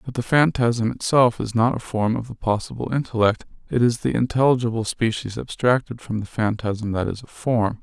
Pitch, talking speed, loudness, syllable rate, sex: 115 Hz, 190 wpm, -22 LUFS, 5.2 syllables/s, male